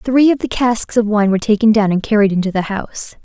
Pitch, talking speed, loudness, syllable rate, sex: 215 Hz, 260 wpm, -15 LUFS, 6.2 syllables/s, female